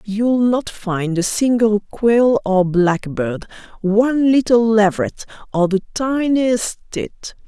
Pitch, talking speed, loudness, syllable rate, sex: 215 Hz, 120 wpm, -17 LUFS, 3.5 syllables/s, female